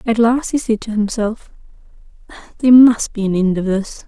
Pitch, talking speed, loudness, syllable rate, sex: 220 Hz, 190 wpm, -15 LUFS, 5.2 syllables/s, female